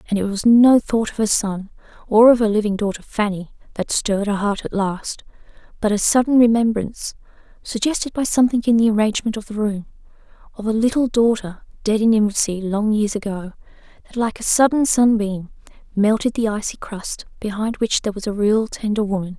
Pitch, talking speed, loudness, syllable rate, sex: 215 Hz, 175 wpm, -19 LUFS, 5.7 syllables/s, female